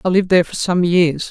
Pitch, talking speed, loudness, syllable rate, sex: 175 Hz, 275 wpm, -15 LUFS, 6.6 syllables/s, female